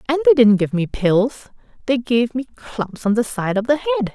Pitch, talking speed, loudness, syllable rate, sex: 240 Hz, 230 wpm, -18 LUFS, 5.1 syllables/s, female